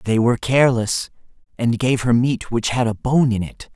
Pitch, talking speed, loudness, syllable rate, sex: 120 Hz, 210 wpm, -19 LUFS, 5.1 syllables/s, male